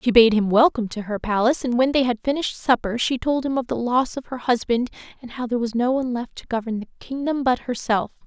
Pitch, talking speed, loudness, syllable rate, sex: 245 Hz, 255 wpm, -22 LUFS, 6.3 syllables/s, female